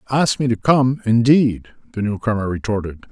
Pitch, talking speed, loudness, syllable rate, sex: 115 Hz, 155 wpm, -18 LUFS, 5.7 syllables/s, male